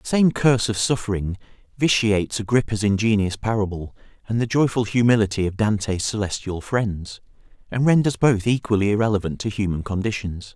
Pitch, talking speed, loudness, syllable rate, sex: 105 Hz, 140 wpm, -21 LUFS, 5.6 syllables/s, male